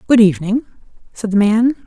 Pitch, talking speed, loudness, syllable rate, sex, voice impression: 220 Hz, 160 wpm, -15 LUFS, 5.7 syllables/s, female, feminine, adult-like, soft, muffled, halting, calm, slightly friendly, reassuring, slightly elegant, kind, modest